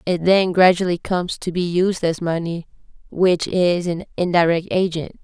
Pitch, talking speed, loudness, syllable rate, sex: 175 Hz, 160 wpm, -19 LUFS, 4.6 syllables/s, female